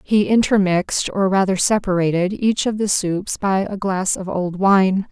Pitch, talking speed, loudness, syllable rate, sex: 195 Hz, 175 wpm, -18 LUFS, 4.4 syllables/s, female